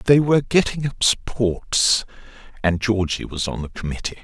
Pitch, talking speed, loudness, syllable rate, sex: 110 Hz, 155 wpm, -20 LUFS, 4.5 syllables/s, male